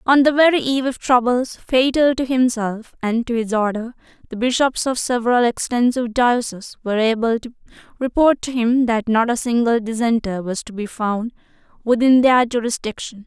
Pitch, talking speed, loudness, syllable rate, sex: 240 Hz, 165 wpm, -18 LUFS, 5.2 syllables/s, female